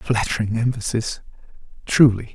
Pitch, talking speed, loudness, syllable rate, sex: 115 Hz, 100 wpm, -20 LUFS, 5.4 syllables/s, male